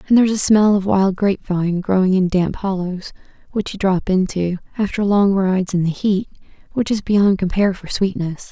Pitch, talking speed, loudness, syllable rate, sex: 195 Hz, 195 wpm, -18 LUFS, 5.2 syllables/s, female